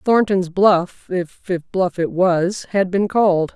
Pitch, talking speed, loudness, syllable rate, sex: 185 Hz, 150 wpm, -18 LUFS, 3.4 syllables/s, female